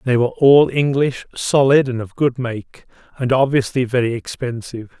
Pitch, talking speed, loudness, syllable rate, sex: 125 Hz, 155 wpm, -17 LUFS, 5.0 syllables/s, male